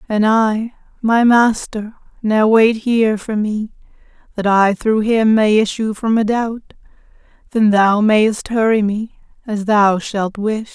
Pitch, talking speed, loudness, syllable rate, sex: 215 Hz, 150 wpm, -15 LUFS, 3.8 syllables/s, female